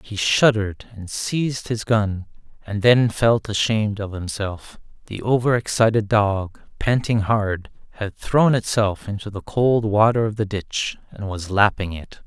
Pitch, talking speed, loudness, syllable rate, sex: 105 Hz, 155 wpm, -21 LUFS, 4.2 syllables/s, male